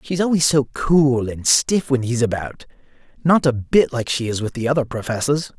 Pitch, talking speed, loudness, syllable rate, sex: 130 Hz, 205 wpm, -19 LUFS, 4.9 syllables/s, male